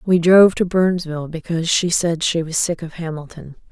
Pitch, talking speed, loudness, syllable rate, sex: 170 Hz, 195 wpm, -18 LUFS, 5.5 syllables/s, female